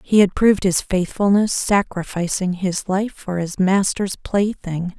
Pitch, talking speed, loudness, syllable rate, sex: 190 Hz, 155 wpm, -19 LUFS, 4.1 syllables/s, female